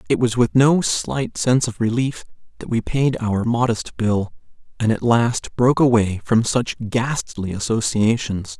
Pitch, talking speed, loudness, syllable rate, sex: 115 Hz, 160 wpm, -19 LUFS, 4.3 syllables/s, male